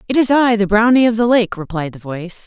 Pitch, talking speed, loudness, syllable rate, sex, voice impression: 210 Hz, 270 wpm, -14 LUFS, 6.1 syllables/s, female, feminine, adult-like, tensed, bright, clear, intellectual, slightly friendly, elegant, lively, slightly sharp